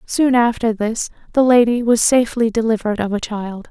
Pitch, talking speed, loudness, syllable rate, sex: 230 Hz, 180 wpm, -17 LUFS, 5.3 syllables/s, female